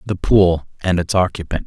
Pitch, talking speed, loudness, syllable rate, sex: 90 Hz, 145 wpm, -17 LUFS, 5.0 syllables/s, male